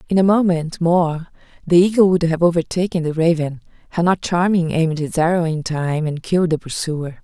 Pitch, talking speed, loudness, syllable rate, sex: 170 Hz, 190 wpm, -18 LUFS, 5.4 syllables/s, female